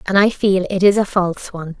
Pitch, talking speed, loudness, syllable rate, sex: 190 Hz, 265 wpm, -16 LUFS, 6.1 syllables/s, female